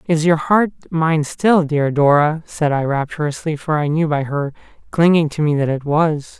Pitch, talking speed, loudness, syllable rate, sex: 155 Hz, 195 wpm, -17 LUFS, 4.6 syllables/s, male